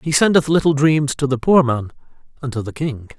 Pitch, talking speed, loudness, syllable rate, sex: 140 Hz, 225 wpm, -17 LUFS, 5.5 syllables/s, male